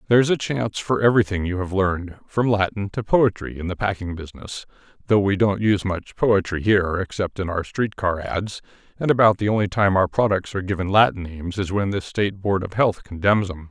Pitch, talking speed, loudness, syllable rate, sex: 100 Hz, 215 wpm, -21 LUFS, 5.8 syllables/s, male